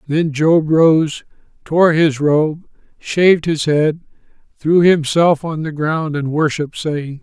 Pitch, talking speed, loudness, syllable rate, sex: 155 Hz, 140 wpm, -15 LUFS, 3.6 syllables/s, male